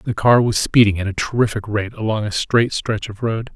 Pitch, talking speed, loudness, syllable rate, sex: 110 Hz, 235 wpm, -18 LUFS, 5.1 syllables/s, male